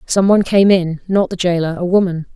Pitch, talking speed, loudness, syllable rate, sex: 180 Hz, 205 wpm, -15 LUFS, 5.7 syllables/s, female